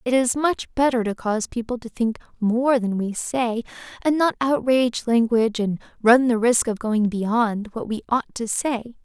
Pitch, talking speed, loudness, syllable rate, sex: 235 Hz, 190 wpm, -22 LUFS, 4.7 syllables/s, female